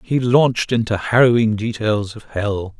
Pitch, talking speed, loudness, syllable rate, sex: 110 Hz, 150 wpm, -18 LUFS, 4.5 syllables/s, male